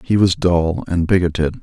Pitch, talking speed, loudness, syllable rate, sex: 90 Hz, 185 wpm, -17 LUFS, 4.7 syllables/s, male